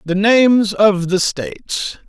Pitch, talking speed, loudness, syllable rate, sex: 200 Hz, 145 wpm, -15 LUFS, 3.7 syllables/s, male